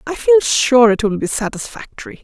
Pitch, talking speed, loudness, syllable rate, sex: 250 Hz, 190 wpm, -14 LUFS, 5.2 syllables/s, female